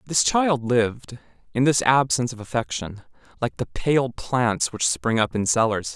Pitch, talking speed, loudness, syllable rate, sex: 120 Hz, 170 wpm, -22 LUFS, 4.4 syllables/s, male